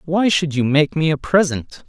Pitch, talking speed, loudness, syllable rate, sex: 155 Hz, 225 wpm, -17 LUFS, 4.6 syllables/s, male